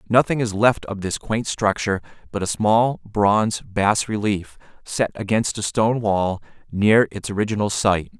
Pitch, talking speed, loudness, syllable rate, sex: 105 Hz, 160 wpm, -21 LUFS, 4.6 syllables/s, male